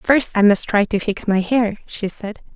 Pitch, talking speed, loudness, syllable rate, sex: 215 Hz, 235 wpm, -18 LUFS, 4.4 syllables/s, female